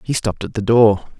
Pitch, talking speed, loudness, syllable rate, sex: 110 Hz, 250 wpm, -16 LUFS, 6.5 syllables/s, male